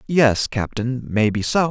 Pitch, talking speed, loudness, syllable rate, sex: 125 Hz, 140 wpm, -20 LUFS, 3.8 syllables/s, male